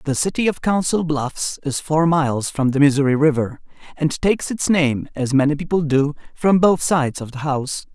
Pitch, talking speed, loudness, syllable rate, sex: 150 Hz, 195 wpm, -19 LUFS, 5.2 syllables/s, male